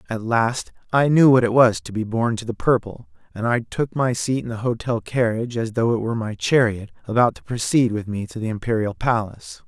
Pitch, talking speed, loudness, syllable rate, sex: 115 Hz, 230 wpm, -21 LUFS, 5.5 syllables/s, male